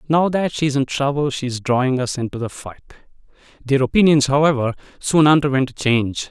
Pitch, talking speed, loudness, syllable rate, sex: 135 Hz, 190 wpm, -18 LUFS, 5.9 syllables/s, male